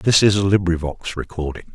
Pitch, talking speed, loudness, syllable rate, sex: 90 Hz, 170 wpm, -20 LUFS, 5.6 syllables/s, male